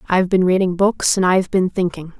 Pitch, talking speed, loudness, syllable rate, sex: 185 Hz, 220 wpm, -17 LUFS, 6.1 syllables/s, female